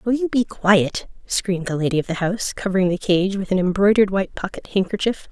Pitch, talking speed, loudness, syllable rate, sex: 195 Hz, 215 wpm, -20 LUFS, 6.2 syllables/s, female